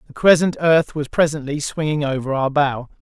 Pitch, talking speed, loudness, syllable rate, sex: 150 Hz, 175 wpm, -18 LUFS, 5.2 syllables/s, male